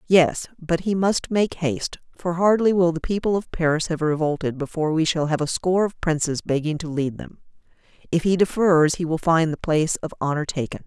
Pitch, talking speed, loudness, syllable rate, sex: 165 Hz, 210 wpm, -22 LUFS, 5.5 syllables/s, female